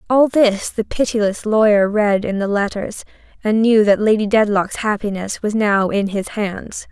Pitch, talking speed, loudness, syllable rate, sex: 210 Hz, 175 wpm, -17 LUFS, 4.4 syllables/s, female